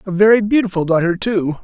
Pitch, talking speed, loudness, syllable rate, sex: 195 Hz, 185 wpm, -15 LUFS, 6.0 syllables/s, male